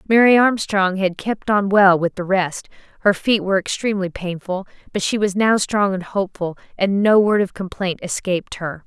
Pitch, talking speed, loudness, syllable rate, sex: 195 Hz, 190 wpm, -19 LUFS, 5.1 syllables/s, female